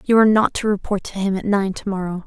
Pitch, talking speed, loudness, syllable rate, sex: 200 Hz, 265 wpm, -19 LUFS, 6.5 syllables/s, female